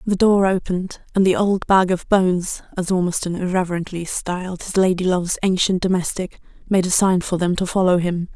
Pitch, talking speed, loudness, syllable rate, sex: 185 Hz, 185 wpm, -19 LUFS, 5.5 syllables/s, female